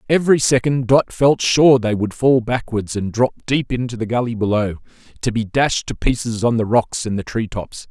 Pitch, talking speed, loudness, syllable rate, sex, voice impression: 120 Hz, 215 wpm, -18 LUFS, 5.0 syllables/s, male, masculine, adult-like, tensed, slightly powerful, hard, clear, slightly raspy, cool, slightly mature, friendly, wild, lively, slightly sharp